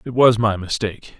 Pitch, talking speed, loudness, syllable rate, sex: 110 Hz, 200 wpm, -19 LUFS, 5.7 syllables/s, male